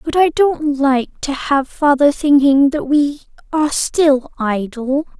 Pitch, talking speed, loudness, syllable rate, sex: 285 Hz, 150 wpm, -15 LUFS, 3.7 syllables/s, female